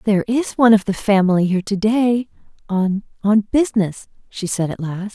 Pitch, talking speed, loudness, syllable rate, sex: 205 Hz, 175 wpm, -18 LUFS, 5.4 syllables/s, female